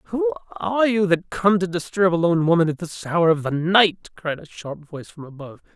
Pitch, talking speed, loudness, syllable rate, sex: 170 Hz, 230 wpm, -20 LUFS, 5.3 syllables/s, male